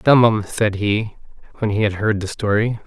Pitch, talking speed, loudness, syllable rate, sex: 105 Hz, 210 wpm, -19 LUFS, 4.7 syllables/s, male